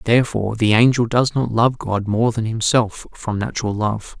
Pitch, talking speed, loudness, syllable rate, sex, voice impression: 115 Hz, 185 wpm, -18 LUFS, 4.9 syllables/s, male, masculine, adult-like, slightly fluent, refreshing, friendly, slightly kind